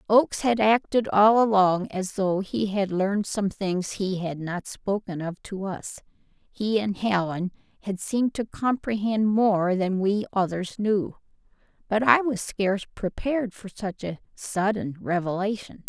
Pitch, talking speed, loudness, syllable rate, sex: 200 Hz, 150 wpm, -25 LUFS, 4.2 syllables/s, female